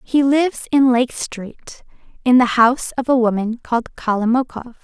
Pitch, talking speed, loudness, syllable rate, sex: 245 Hz, 160 wpm, -17 LUFS, 4.7 syllables/s, female